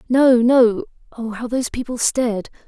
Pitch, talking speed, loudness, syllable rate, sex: 240 Hz, 155 wpm, -18 LUFS, 4.8 syllables/s, female